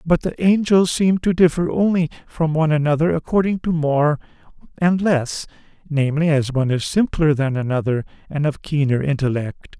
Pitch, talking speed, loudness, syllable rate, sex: 155 Hz, 155 wpm, -19 LUFS, 5.2 syllables/s, male